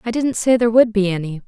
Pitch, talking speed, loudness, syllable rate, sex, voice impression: 215 Hz, 285 wpm, -17 LUFS, 6.8 syllables/s, female, feminine, adult-like, fluent, slightly intellectual, calm